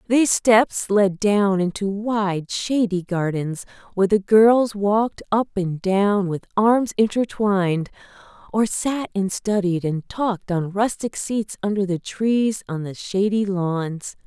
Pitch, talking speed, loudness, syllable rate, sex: 200 Hz, 145 wpm, -21 LUFS, 3.8 syllables/s, female